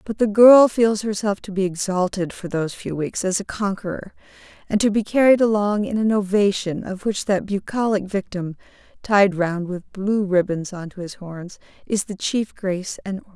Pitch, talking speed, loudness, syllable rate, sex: 195 Hz, 195 wpm, -20 LUFS, 5.0 syllables/s, female